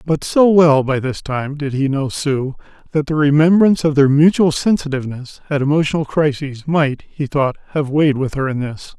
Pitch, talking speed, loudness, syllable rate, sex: 145 Hz, 195 wpm, -16 LUFS, 5.2 syllables/s, male